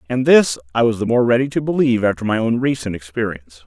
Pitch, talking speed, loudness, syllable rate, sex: 115 Hz, 230 wpm, -17 LUFS, 6.7 syllables/s, male